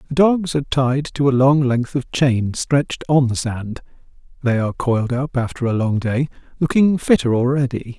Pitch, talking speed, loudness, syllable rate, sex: 130 Hz, 190 wpm, -18 LUFS, 5.0 syllables/s, male